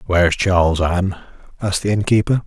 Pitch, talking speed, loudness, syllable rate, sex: 95 Hz, 170 wpm, -17 LUFS, 6.3 syllables/s, male